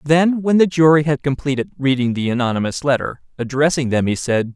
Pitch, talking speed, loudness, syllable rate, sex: 140 Hz, 185 wpm, -17 LUFS, 5.7 syllables/s, male